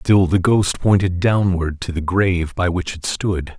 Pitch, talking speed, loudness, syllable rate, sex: 90 Hz, 200 wpm, -18 LUFS, 4.2 syllables/s, male